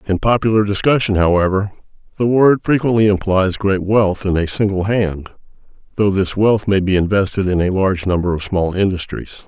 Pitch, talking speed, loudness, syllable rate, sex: 100 Hz, 170 wpm, -16 LUFS, 5.4 syllables/s, male